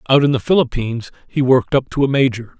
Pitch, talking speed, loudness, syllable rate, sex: 130 Hz, 230 wpm, -17 LUFS, 6.7 syllables/s, male